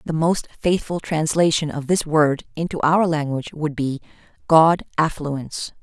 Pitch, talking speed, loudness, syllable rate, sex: 155 Hz, 145 wpm, -20 LUFS, 4.6 syllables/s, female